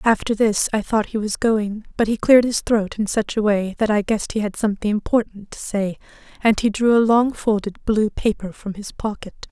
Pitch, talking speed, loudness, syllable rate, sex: 215 Hz, 225 wpm, -20 LUFS, 5.2 syllables/s, female